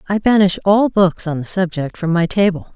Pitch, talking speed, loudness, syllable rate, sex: 185 Hz, 215 wpm, -16 LUFS, 5.2 syllables/s, female